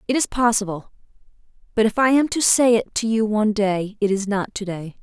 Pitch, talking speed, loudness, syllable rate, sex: 215 Hz, 225 wpm, -20 LUFS, 5.6 syllables/s, female